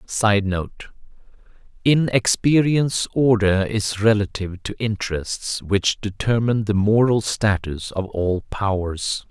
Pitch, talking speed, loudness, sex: 105 Hz, 105 wpm, -20 LUFS, male